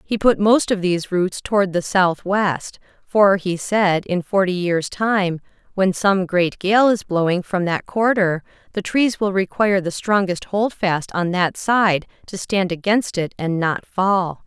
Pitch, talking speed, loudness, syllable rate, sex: 190 Hz, 175 wpm, -19 LUFS, 4.1 syllables/s, female